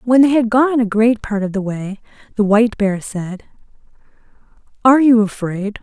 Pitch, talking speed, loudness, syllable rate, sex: 220 Hz, 175 wpm, -15 LUFS, 5.0 syllables/s, female